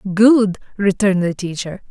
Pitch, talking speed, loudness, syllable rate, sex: 195 Hz, 125 wpm, -17 LUFS, 5.1 syllables/s, female